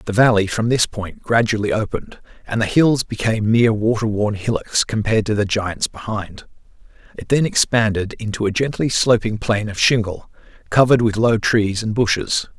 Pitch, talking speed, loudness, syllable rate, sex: 110 Hz, 170 wpm, -18 LUFS, 5.3 syllables/s, male